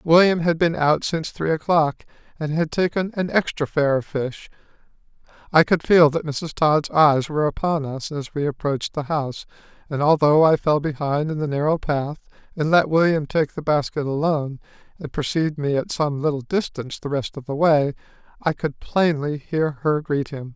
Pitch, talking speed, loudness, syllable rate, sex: 150 Hz, 190 wpm, -21 LUFS, 5.1 syllables/s, male